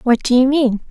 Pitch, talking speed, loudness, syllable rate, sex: 255 Hz, 265 wpm, -14 LUFS, 5.3 syllables/s, female